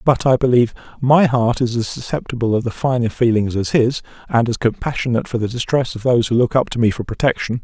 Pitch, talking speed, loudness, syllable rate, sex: 120 Hz, 230 wpm, -18 LUFS, 6.3 syllables/s, male